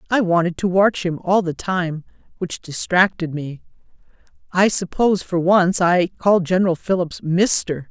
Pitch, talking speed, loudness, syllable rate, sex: 180 Hz, 150 wpm, -19 LUFS, 4.7 syllables/s, female